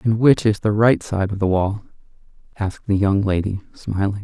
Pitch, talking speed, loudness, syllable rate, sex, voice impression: 105 Hz, 200 wpm, -19 LUFS, 5.2 syllables/s, male, masculine, slightly adult-like, slightly weak, slightly sincere, slightly calm, kind, slightly modest